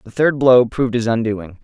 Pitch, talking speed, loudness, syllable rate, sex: 120 Hz, 220 wpm, -16 LUFS, 5.2 syllables/s, male